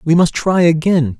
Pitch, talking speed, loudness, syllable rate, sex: 165 Hz, 200 wpm, -14 LUFS, 4.6 syllables/s, male